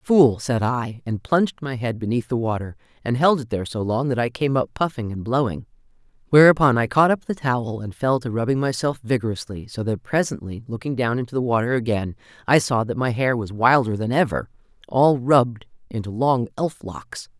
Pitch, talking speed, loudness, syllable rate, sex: 125 Hz, 200 wpm, -21 LUFS, 5.4 syllables/s, female